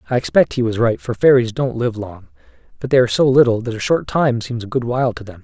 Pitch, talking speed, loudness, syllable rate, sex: 115 Hz, 275 wpm, -17 LUFS, 6.3 syllables/s, male